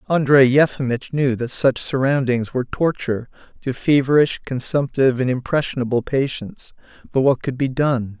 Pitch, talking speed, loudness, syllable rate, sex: 130 Hz, 140 wpm, -19 LUFS, 5.1 syllables/s, male